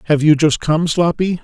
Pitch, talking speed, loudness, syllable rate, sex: 160 Hz, 210 wpm, -15 LUFS, 4.8 syllables/s, male